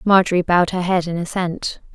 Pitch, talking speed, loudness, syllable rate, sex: 180 Hz, 185 wpm, -19 LUFS, 5.8 syllables/s, female